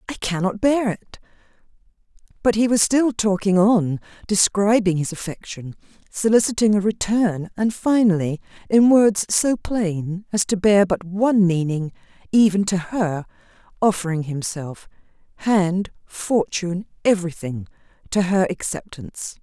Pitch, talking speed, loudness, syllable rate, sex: 195 Hz, 120 wpm, -20 LUFS, 4.4 syllables/s, female